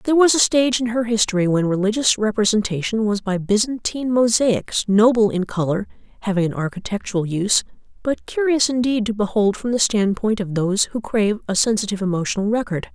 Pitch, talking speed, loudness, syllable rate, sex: 215 Hz, 170 wpm, -19 LUFS, 6.1 syllables/s, female